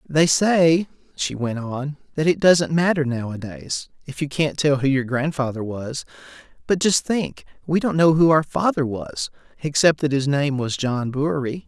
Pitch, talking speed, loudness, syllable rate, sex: 145 Hz, 170 wpm, -21 LUFS, 4.5 syllables/s, male